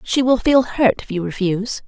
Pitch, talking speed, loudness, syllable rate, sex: 225 Hz, 225 wpm, -18 LUFS, 5.3 syllables/s, female